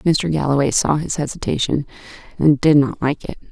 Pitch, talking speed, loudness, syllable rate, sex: 145 Hz, 170 wpm, -18 LUFS, 5.2 syllables/s, female